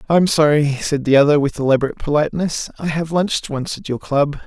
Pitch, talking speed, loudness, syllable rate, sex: 150 Hz, 200 wpm, -17 LUFS, 6.0 syllables/s, male